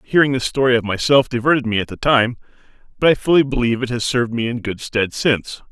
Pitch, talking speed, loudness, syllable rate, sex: 125 Hz, 230 wpm, -18 LUFS, 6.5 syllables/s, male